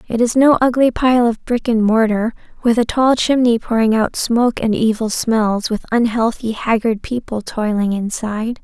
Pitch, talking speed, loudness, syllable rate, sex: 230 Hz, 175 wpm, -16 LUFS, 4.7 syllables/s, female